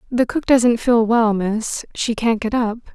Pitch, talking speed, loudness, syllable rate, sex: 230 Hz, 205 wpm, -18 LUFS, 4.0 syllables/s, female